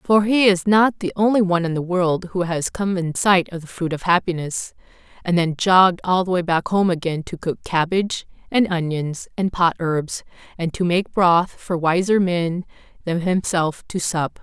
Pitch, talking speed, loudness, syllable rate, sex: 180 Hz, 200 wpm, -20 LUFS, 4.7 syllables/s, female